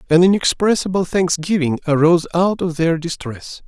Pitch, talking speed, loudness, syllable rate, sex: 170 Hz, 130 wpm, -17 LUFS, 5.1 syllables/s, male